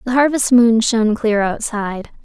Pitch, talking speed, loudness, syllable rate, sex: 225 Hz, 160 wpm, -15 LUFS, 4.9 syllables/s, female